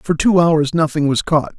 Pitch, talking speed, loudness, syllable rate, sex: 155 Hz, 230 wpm, -15 LUFS, 4.8 syllables/s, male